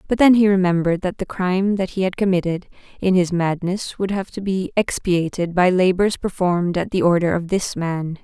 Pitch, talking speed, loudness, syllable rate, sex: 185 Hz, 205 wpm, -19 LUFS, 5.3 syllables/s, female